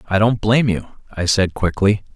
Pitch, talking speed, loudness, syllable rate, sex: 100 Hz, 195 wpm, -18 LUFS, 5.6 syllables/s, male